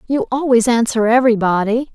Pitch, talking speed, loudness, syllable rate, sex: 240 Hz, 155 wpm, -15 LUFS, 5.8 syllables/s, female